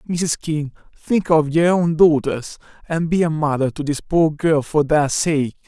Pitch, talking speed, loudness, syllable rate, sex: 155 Hz, 190 wpm, -18 LUFS, 4.2 syllables/s, male